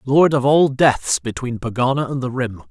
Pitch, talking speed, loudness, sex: 130 Hz, 200 wpm, -18 LUFS, male